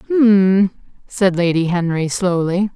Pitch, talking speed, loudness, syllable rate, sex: 190 Hz, 110 wpm, -16 LUFS, 3.3 syllables/s, female